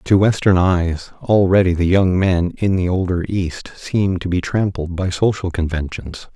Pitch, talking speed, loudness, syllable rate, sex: 90 Hz, 170 wpm, -18 LUFS, 4.5 syllables/s, male